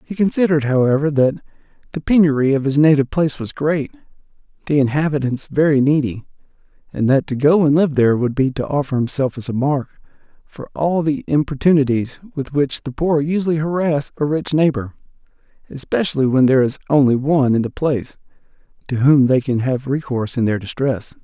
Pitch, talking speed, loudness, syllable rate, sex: 140 Hz, 175 wpm, -17 LUFS, 5.8 syllables/s, male